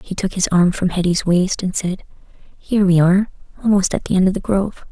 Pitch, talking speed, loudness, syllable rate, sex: 185 Hz, 230 wpm, -17 LUFS, 6.1 syllables/s, female